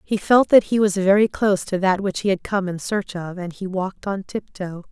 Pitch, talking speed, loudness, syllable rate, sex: 195 Hz, 255 wpm, -20 LUFS, 5.2 syllables/s, female